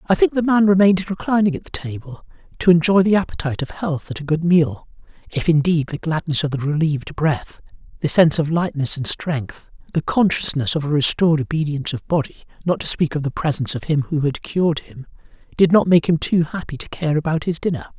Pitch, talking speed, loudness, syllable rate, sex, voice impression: 160 Hz, 215 wpm, -19 LUFS, 6.0 syllables/s, male, very masculine, old, very thick, slightly tensed, very powerful, dark, soft, muffled, fluent, very raspy, slightly cool, intellectual, sincere, slightly calm, very mature, slightly friendly, slightly reassuring, very unique, slightly elegant, wild, slightly sweet, lively, strict, intense, very sharp